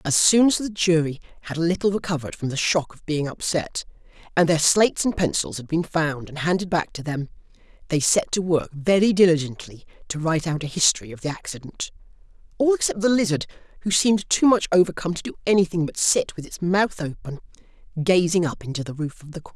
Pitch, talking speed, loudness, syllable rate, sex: 170 Hz, 210 wpm, -22 LUFS, 6.1 syllables/s, male